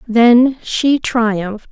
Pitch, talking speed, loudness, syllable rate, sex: 235 Hz, 105 wpm, -14 LUFS, 2.7 syllables/s, female